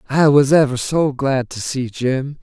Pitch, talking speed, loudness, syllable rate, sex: 135 Hz, 200 wpm, -17 LUFS, 4.1 syllables/s, male